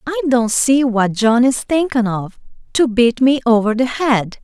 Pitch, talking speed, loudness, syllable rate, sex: 240 Hz, 190 wpm, -15 LUFS, 4.5 syllables/s, female